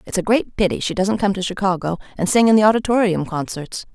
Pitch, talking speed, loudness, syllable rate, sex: 195 Hz, 230 wpm, -18 LUFS, 6.1 syllables/s, female